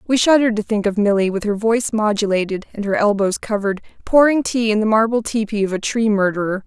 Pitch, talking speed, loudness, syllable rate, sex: 215 Hz, 215 wpm, -18 LUFS, 6.3 syllables/s, female